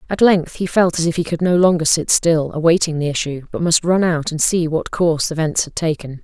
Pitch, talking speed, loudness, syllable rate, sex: 165 Hz, 250 wpm, -17 LUFS, 5.5 syllables/s, female